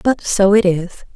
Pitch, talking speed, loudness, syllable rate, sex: 195 Hz, 210 wpm, -15 LUFS, 4.8 syllables/s, female